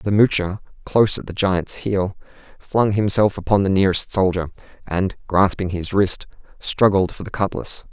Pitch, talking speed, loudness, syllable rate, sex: 95 Hz, 160 wpm, -20 LUFS, 4.9 syllables/s, male